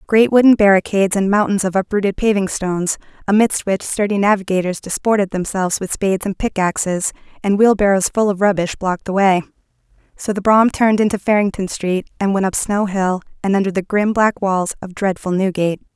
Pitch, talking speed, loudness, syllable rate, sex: 195 Hz, 180 wpm, -17 LUFS, 5.9 syllables/s, female